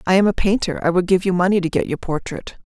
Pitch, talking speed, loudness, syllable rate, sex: 185 Hz, 290 wpm, -19 LUFS, 6.5 syllables/s, female